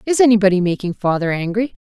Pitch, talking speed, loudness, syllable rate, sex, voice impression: 205 Hz, 165 wpm, -17 LUFS, 6.7 syllables/s, female, feminine, adult-like, tensed, powerful, slightly hard, clear, fluent, intellectual, calm, slightly reassuring, elegant, slightly strict